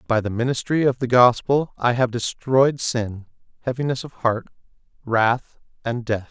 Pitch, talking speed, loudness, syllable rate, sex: 120 Hz, 150 wpm, -21 LUFS, 4.5 syllables/s, male